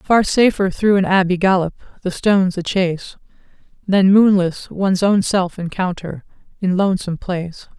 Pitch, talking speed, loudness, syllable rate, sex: 190 Hz, 140 wpm, -17 LUFS, 5.1 syllables/s, female